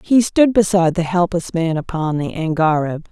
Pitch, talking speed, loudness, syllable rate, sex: 175 Hz, 175 wpm, -17 LUFS, 5.0 syllables/s, female